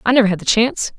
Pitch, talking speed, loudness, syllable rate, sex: 215 Hz, 305 wpm, -16 LUFS, 8.1 syllables/s, female